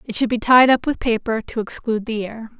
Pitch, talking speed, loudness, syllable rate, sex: 230 Hz, 255 wpm, -18 LUFS, 5.7 syllables/s, female